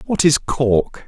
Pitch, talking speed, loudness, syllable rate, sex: 140 Hz, 170 wpm, -17 LUFS, 3.2 syllables/s, male